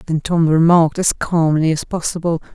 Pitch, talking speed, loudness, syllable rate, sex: 165 Hz, 165 wpm, -16 LUFS, 5.3 syllables/s, female